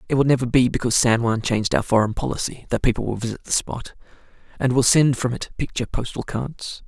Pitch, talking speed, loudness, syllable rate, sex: 120 Hz, 220 wpm, -21 LUFS, 6.4 syllables/s, male